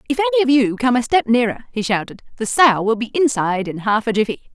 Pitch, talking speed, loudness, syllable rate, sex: 240 Hz, 250 wpm, -18 LUFS, 6.7 syllables/s, female